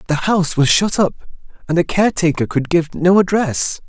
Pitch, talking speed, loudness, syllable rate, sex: 170 Hz, 185 wpm, -16 LUFS, 5.2 syllables/s, male